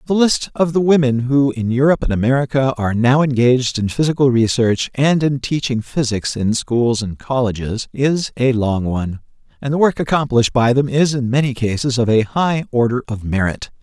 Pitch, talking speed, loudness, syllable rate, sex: 125 Hz, 190 wpm, -17 LUFS, 5.3 syllables/s, male